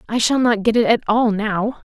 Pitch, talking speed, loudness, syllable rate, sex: 225 Hz, 250 wpm, -17 LUFS, 4.9 syllables/s, female